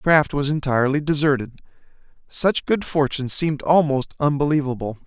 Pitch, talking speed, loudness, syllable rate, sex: 145 Hz, 130 wpm, -20 LUFS, 5.7 syllables/s, male